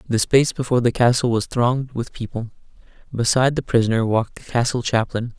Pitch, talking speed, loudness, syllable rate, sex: 120 Hz, 180 wpm, -20 LUFS, 6.3 syllables/s, male